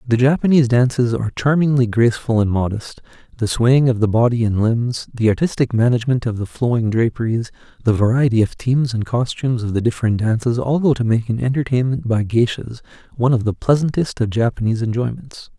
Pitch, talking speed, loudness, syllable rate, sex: 120 Hz, 180 wpm, -18 LUFS, 6.1 syllables/s, male